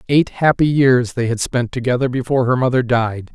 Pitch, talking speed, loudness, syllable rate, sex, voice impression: 125 Hz, 200 wpm, -17 LUFS, 5.4 syllables/s, male, masculine, adult-like, slightly fluent, cool, refreshing, sincere, friendly